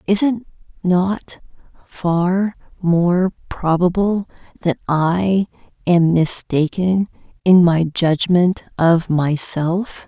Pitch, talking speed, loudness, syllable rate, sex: 180 Hz, 90 wpm, -18 LUFS, 2.9 syllables/s, female